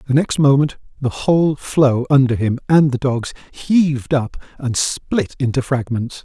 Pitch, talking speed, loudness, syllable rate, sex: 135 Hz, 165 wpm, -17 LUFS, 4.4 syllables/s, male